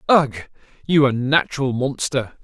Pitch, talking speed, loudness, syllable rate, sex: 135 Hz, 100 wpm, -19 LUFS, 4.3 syllables/s, male